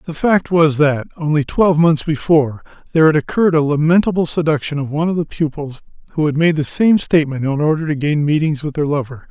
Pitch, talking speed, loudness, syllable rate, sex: 155 Hz, 215 wpm, -16 LUFS, 6.2 syllables/s, male